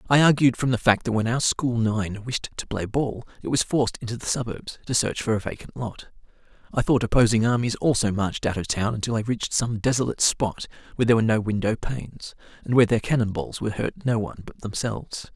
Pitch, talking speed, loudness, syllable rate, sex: 115 Hz, 225 wpm, -24 LUFS, 6.1 syllables/s, male